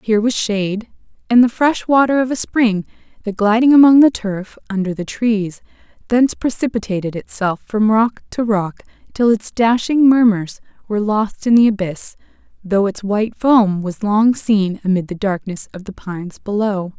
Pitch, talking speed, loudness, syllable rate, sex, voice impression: 215 Hz, 170 wpm, -16 LUFS, 4.9 syllables/s, female, feminine, slightly adult-like, slightly intellectual, slightly elegant